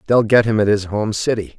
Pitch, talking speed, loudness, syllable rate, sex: 105 Hz, 265 wpm, -17 LUFS, 5.7 syllables/s, male